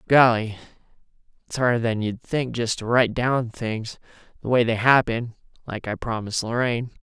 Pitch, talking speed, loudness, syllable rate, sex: 115 Hz, 160 wpm, -22 LUFS, 5.5 syllables/s, male